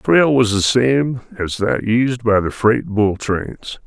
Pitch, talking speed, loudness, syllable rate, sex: 115 Hz, 200 wpm, -17 LUFS, 3.6 syllables/s, male